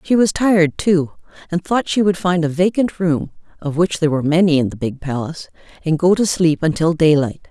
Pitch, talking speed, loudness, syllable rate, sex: 165 Hz, 200 wpm, -17 LUFS, 5.6 syllables/s, female